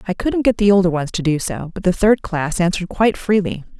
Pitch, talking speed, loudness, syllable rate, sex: 185 Hz, 255 wpm, -18 LUFS, 6.0 syllables/s, female